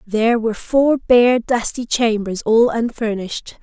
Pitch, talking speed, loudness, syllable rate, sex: 230 Hz, 130 wpm, -17 LUFS, 4.3 syllables/s, female